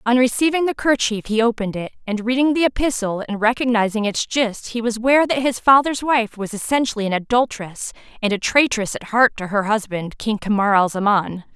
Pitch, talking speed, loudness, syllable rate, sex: 230 Hz, 195 wpm, -19 LUFS, 5.5 syllables/s, female